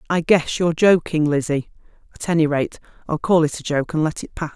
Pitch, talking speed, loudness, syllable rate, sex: 160 Hz, 225 wpm, -20 LUFS, 5.8 syllables/s, female